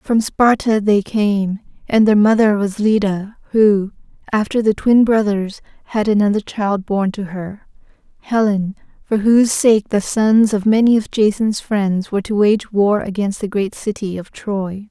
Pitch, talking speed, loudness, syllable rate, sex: 210 Hz, 160 wpm, -16 LUFS, 4.3 syllables/s, female